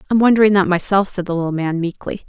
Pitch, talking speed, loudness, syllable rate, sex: 190 Hz, 235 wpm, -16 LUFS, 6.9 syllables/s, female